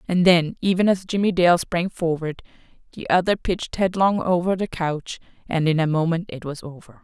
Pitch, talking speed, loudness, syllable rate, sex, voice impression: 175 Hz, 190 wpm, -21 LUFS, 5.2 syllables/s, female, feminine, slightly adult-like, intellectual, calm, slightly sweet